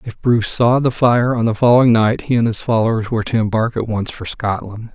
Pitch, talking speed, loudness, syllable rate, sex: 115 Hz, 245 wpm, -16 LUFS, 5.8 syllables/s, male